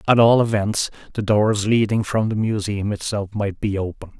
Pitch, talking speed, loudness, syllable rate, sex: 105 Hz, 185 wpm, -20 LUFS, 4.8 syllables/s, male